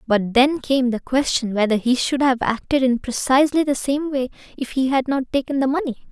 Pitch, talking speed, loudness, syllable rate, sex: 265 Hz, 215 wpm, -20 LUFS, 5.3 syllables/s, female